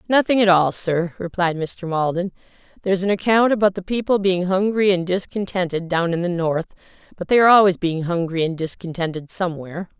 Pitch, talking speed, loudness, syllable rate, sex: 180 Hz, 180 wpm, -20 LUFS, 5.8 syllables/s, female